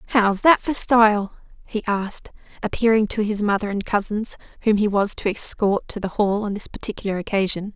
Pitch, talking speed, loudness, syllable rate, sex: 210 Hz, 185 wpm, -21 LUFS, 5.5 syllables/s, female